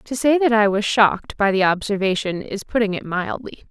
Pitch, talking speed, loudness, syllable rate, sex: 210 Hz, 210 wpm, -19 LUFS, 5.3 syllables/s, female